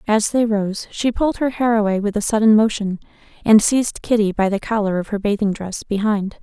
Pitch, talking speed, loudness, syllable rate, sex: 215 Hz, 215 wpm, -18 LUFS, 5.6 syllables/s, female